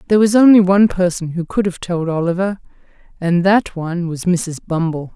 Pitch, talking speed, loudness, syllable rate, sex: 180 Hz, 185 wpm, -16 LUFS, 5.6 syllables/s, female